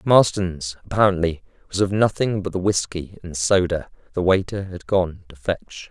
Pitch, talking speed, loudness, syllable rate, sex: 90 Hz, 165 wpm, -22 LUFS, 4.6 syllables/s, male